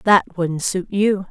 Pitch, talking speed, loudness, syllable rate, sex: 190 Hz, 185 wpm, -19 LUFS, 3.7 syllables/s, female